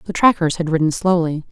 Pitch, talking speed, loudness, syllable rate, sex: 170 Hz, 200 wpm, -17 LUFS, 6.1 syllables/s, female